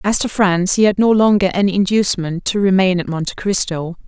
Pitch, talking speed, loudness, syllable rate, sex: 190 Hz, 205 wpm, -16 LUFS, 5.7 syllables/s, female